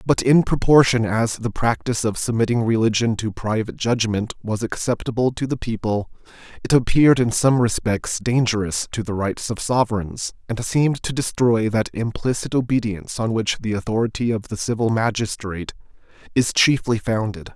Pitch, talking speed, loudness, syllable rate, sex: 115 Hz, 155 wpm, -21 LUFS, 5.3 syllables/s, male